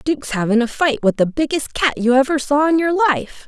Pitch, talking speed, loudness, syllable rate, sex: 260 Hz, 240 wpm, -17 LUFS, 5.3 syllables/s, female